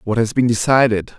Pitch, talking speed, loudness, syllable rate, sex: 115 Hz, 200 wpm, -16 LUFS, 5.6 syllables/s, male